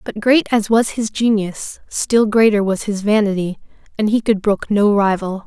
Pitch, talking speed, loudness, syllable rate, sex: 210 Hz, 185 wpm, -17 LUFS, 4.5 syllables/s, female